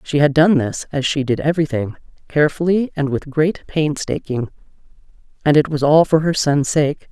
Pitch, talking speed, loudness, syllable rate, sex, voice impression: 150 Hz, 175 wpm, -17 LUFS, 5.1 syllables/s, female, feminine, adult-like, slightly middle-aged, tensed, clear, fluent, intellectual, reassuring, elegant, lively, slightly strict, slightly sharp